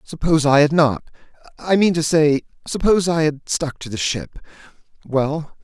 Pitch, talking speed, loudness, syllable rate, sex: 155 Hz, 160 wpm, -18 LUFS, 4.9 syllables/s, male